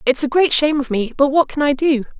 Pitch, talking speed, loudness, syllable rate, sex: 275 Hz, 300 wpm, -16 LUFS, 6.2 syllables/s, female